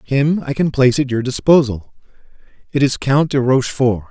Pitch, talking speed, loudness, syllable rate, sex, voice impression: 135 Hz, 175 wpm, -16 LUFS, 5.4 syllables/s, male, very masculine, very middle-aged, very thick, slightly tensed, very powerful, slightly dark, soft, clear, fluent, raspy, cool, very intellectual, refreshing, sincere, very calm, mature, friendly, reassuring, very unique, slightly elegant, wild, sweet, lively, kind, modest